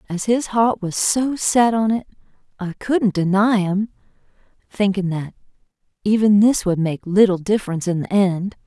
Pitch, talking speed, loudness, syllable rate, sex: 200 Hz, 160 wpm, -19 LUFS, 4.6 syllables/s, female